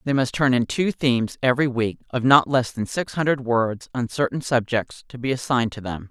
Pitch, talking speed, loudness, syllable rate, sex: 125 Hz, 225 wpm, -22 LUFS, 5.4 syllables/s, female